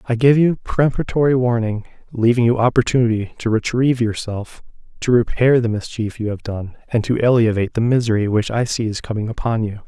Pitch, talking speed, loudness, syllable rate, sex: 115 Hz, 180 wpm, -18 LUFS, 5.7 syllables/s, male